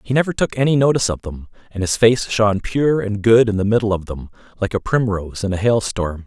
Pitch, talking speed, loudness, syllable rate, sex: 110 Hz, 240 wpm, -18 LUFS, 6.0 syllables/s, male